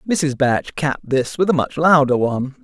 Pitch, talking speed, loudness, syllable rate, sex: 140 Hz, 205 wpm, -18 LUFS, 5.1 syllables/s, male